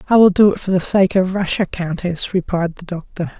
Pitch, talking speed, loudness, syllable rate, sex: 180 Hz, 230 wpm, -17 LUFS, 5.4 syllables/s, female